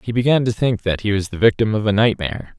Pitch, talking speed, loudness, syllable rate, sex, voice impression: 105 Hz, 280 wpm, -18 LUFS, 6.4 syllables/s, male, very masculine, adult-like, slightly thick, cool, sincere, slightly friendly